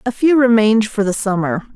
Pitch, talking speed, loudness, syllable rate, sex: 220 Hz, 205 wpm, -15 LUFS, 5.7 syllables/s, female